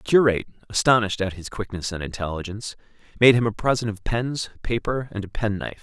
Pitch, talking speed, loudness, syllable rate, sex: 105 Hz, 185 wpm, -23 LUFS, 6.6 syllables/s, male